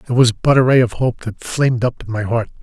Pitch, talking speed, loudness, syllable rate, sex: 120 Hz, 300 wpm, -16 LUFS, 5.8 syllables/s, male